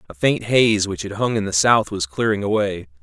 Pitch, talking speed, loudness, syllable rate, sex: 100 Hz, 240 wpm, -19 LUFS, 5.2 syllables/s, male